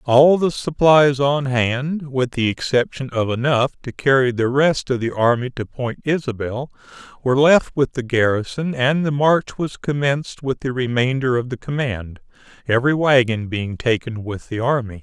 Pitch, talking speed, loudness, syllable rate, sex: 130 Hz, 170 wpm, -19 LUFS, 4.6 syllables/s, male